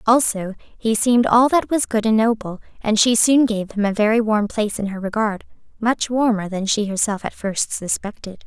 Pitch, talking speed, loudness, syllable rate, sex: 215 Hz, 205 wpm, -19 LUFS, 5.2 syllables/s, female